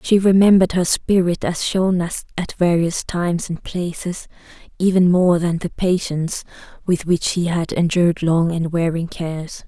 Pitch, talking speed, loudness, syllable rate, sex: 175 Hz, 155 wpm, -19 LUFS, 4.7 syllables/s, female